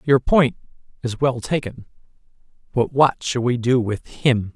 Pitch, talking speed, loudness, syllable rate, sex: 125 Hz, 160 wpm, -20 LUFS, 4.2 syllables/s, male